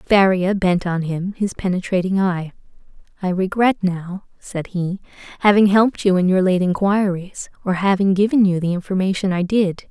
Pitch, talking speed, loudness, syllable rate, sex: 190 Hz, 165 wpm, -18 LUFS, 4.9 syllables/s, female